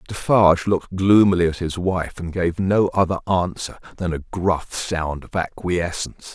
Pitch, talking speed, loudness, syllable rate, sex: 90 Hz, 160 wpm, -20 LUFS, 4.6 syllables/s, male